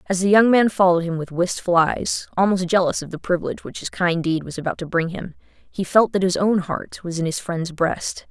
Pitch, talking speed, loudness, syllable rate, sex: 175 Hz, 230 wpm, -20 LUFS, 5.4 syllables/s, female